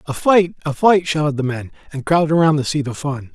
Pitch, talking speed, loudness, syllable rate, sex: 150 Hz, 250 wpm, -17 LUFS, 5.8 syllables/s, male